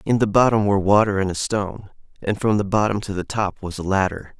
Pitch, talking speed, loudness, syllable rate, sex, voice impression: 100 Hz, 245 wpm, -20 LUFS, 6.0 syllables/s, male, masculine, adult-like, slightly thick, slightly cool, sincere, slightly calm, kind